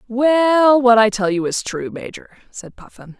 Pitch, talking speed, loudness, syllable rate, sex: 230 Hz, 190 wpm, -15 LUFS, 4.1 syllables/s, female